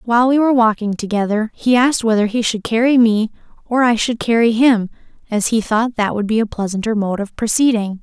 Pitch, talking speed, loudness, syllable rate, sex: 225 Hz, 210 wpm, -16 LUFS, 5.7 syllables/s, female